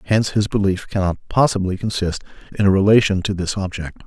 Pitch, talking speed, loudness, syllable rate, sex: 100 Hz, 175 wpm, -19 LUFS, 6.1 syllables/s, male